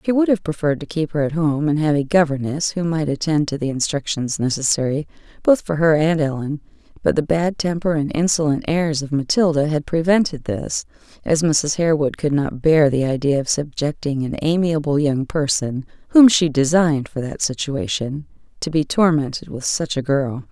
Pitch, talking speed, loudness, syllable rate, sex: 150 Hz, 185 wpm, -19 LUFS, 5.2 syllables/s, female